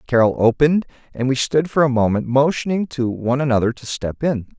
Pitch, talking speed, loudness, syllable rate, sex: 130 Hz, 195 wpm, -19 LUFS, 5.9 syllables/s, male